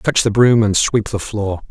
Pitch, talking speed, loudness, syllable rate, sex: 105 Hz, 245 wpm, -15 LUFS, 4.3 syllables/s, male